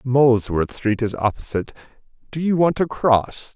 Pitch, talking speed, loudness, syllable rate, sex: 125 Hz, 150 wpm, -20 LUFS, 4.9 syllables/s, male